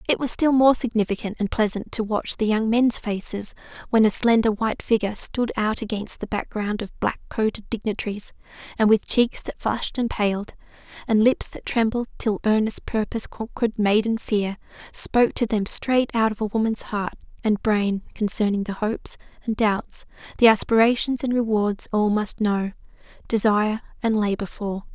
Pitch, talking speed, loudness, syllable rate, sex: 220 Hz, 170 wpm, -23 LUFS, 5.1 syllables/s, female